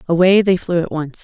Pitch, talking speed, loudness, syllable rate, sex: 175 Hz, 245 wpm, -15 LUFS, 5.6 syllables/s, female